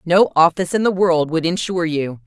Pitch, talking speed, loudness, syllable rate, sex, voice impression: 170 Hz, 210 wpm, -17 LUFS, 5.6 syllables/s, female, feminine, slightly gender-neutral, very adult-like, slightly middle-aged, thin, tensed, powerful, bright, hard, clear, fluent, cool, intellectual, slightly refreshing, sincere, calm, slightly mature, friendly, reassuring, very unique, lively, slightly strict, slightly intense